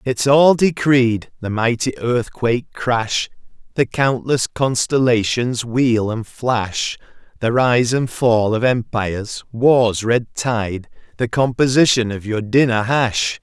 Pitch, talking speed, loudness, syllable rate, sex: 120 Hz, 125 wpm, -17 LUFS, 3.5 syllables/s, male